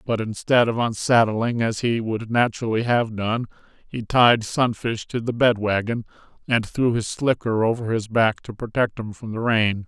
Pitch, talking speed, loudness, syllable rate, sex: 115 Hz, 180 wpm, -22 LUFS, 4.6 syllables/s, male